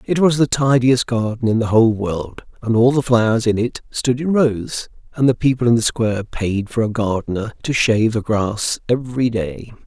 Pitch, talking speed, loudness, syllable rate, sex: 115 Hz, 205 wpm, -18 LUFS, 5.0 syllables/s, male